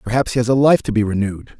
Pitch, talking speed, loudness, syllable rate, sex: 115 Hz, 300 wpm, -17 LUFS, 7.4 syllables/s, male